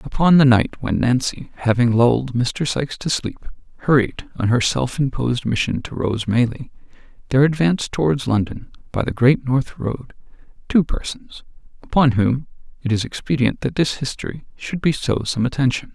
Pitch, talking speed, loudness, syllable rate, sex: 130 Hz, 160 wpm, -19 LUFS, 5.1 syllables/s, male